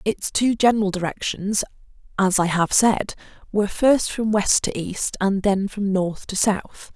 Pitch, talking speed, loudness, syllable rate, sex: 200 Hz, 175 wpm, -21 LUFS, 4.2 syllables/s, female